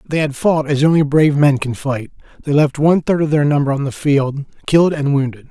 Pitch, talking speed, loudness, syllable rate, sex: 145 Hz, 240 wpm, -15 LUFS, 5.8 syllables/s, male